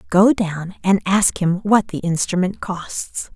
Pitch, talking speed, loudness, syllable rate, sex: 190 Hz, 160 wpm, -19 LUFS, 3.7 syllables/s, female